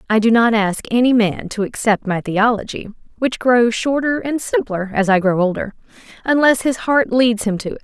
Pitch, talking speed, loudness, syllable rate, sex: 230 Hz, 200 wpm, -17 LUFS, 3.7 syllables/s, female